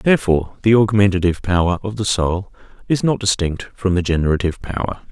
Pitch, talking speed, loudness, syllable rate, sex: 100 Hz, 165 wpm, -18 LUFS, 6.2 syllables/s, male